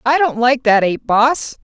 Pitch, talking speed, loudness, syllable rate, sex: 245 Hz, 205 wpm, -15 LUFS, 4.6 syllables/s, female